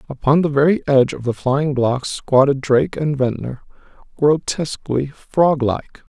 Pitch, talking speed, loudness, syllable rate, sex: 140 Hz, 145 wpm, -18 LUFS, 4.6 syllables/s, male